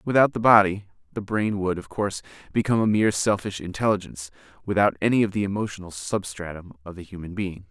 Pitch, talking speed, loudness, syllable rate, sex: 100 Hz, 180 wpm, -23 LUFS, 6.4 syllables/s, male